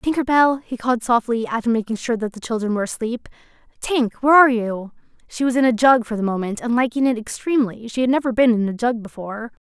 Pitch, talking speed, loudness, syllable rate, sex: 235 Hz, 230 wpm, -19 LUFS, 6.5 syllables/s, female